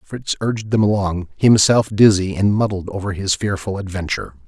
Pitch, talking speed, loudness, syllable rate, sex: 100 Hz, 160 wpm, -18 LUFS, 5.3 syllables/s, male